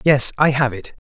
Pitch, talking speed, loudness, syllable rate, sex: 135 Hz, 225 wpm, -17 LUFS, 4.8 syllables/s, male